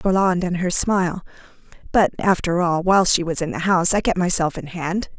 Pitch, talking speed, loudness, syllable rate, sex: 180 Hz, 210 wpm, -19 LUFS, 5.9 syllables/s, female